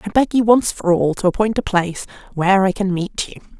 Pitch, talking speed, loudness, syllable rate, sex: 195 Hz, 250 wpm, -17 LUFS, 5.8 syllables/s, female